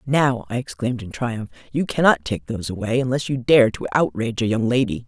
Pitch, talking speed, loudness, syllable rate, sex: 120 Hz, 215 wpm, -21 LUFS, 5.8 syllables/s, female